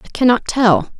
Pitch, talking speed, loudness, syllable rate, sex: 235 Hz, 180 wpm, -15 LUFS, 4.8 syllables/s, female